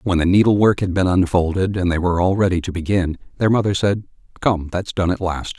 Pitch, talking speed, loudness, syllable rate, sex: 90 Hz, 235 wpm, -18 LUFS, 6.0 syllables/s, male